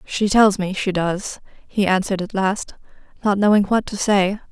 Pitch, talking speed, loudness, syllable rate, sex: 200 Hz, 185 wpm, -19 LUFS, 4.7 syllables/s, female